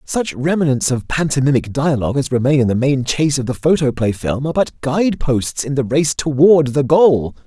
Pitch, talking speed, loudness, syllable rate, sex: 140 Hz, 200 wpm, -16 LUFS, 5.2 syllables/s, male